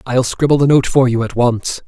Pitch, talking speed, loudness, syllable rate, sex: 125 Hz, 255 wpm, -14 LUFS, 5.1 syllables/s, male